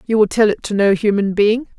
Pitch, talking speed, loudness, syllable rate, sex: 210 Hz, 270 wpm, -16 LUFS, 5.6 syllables/s, female